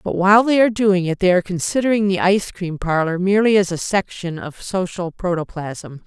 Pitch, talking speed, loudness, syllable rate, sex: 190 Hz, 200 wpm, -18 LUFS, 5.7 syllables/s, female